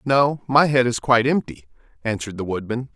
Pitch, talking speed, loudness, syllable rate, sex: 125 Hz, 185 wpm, -20 LUFS, 5.9 syllables/s, male